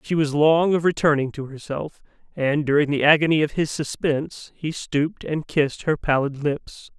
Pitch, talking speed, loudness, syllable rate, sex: 150 Hz, 180 wpm, -22 LUFS, 5.0 syllables/s, male